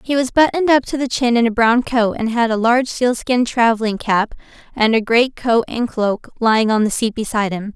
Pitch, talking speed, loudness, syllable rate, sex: 235 Hz, 225 wpm, -17 LUFS, 5.5 syllables/s, female